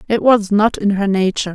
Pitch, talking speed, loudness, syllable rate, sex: 205 Hz, 235 wpm, -15 LUFS, 5.8 syllables/s, female